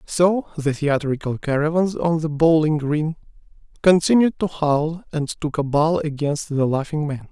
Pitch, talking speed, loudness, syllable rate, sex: 155 Hz, 150 wpm, -20 LUFS, 4.4 syllables/s, male